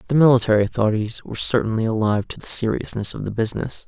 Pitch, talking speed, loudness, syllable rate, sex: 115 Hz, 185 wpm, -20 LUFS, 7.4 syllables/s, male